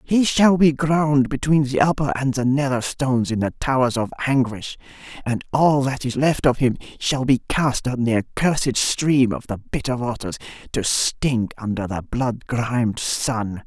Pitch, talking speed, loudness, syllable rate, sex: 130 Hz, 180 wpm, -20 LUFS, 4.4 syllables/s, male